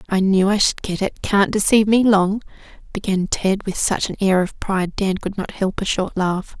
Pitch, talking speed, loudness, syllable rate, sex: 195 Hz, 225 wpm, -19 LUFS, 4.9 syllables/s, female